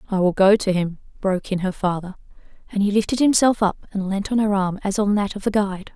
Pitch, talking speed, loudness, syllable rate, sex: 200 Hz, 250 wpm, -21 LUFS, 6.2 syllables/s, female